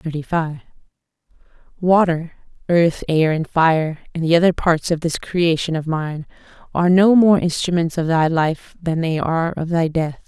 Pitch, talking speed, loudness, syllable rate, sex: 165 Hz, 165 wpm, -18 LUFS, 4.7 syllables/s, female